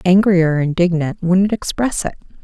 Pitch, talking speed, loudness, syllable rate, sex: 180 Hz, 150 wpm, -16 LUFS, 4.8 syllables/s, female